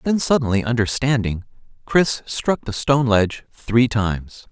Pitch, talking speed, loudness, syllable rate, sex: 120 Hz, 135 wpm, -19 LUFS, 4.7 syllables/s, male